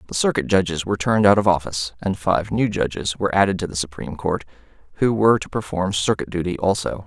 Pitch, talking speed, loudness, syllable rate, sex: 95 Hz, 210 wpm, -21 LUFS, 6.6 syllables/s, male